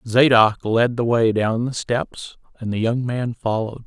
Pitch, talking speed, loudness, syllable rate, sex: 115 Hz, 185 wpm, -19 LUFS, 4.2 syllables/s, male